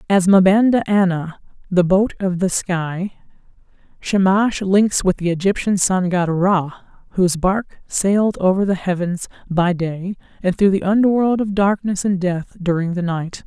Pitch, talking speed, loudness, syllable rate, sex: 190 Hz, 160 wpm, -18 LUFS, 4.5 syllables/s, female